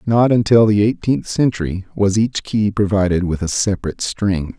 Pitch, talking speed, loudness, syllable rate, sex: 105 Hz, 170 wpm, -17 LUFS, 5.1 syllables/s, male